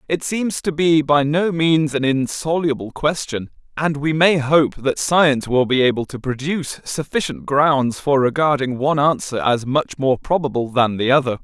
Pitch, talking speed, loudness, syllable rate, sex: 145 Hz, 180 wpm, -18 LUFS, 4.7 syllables/s, male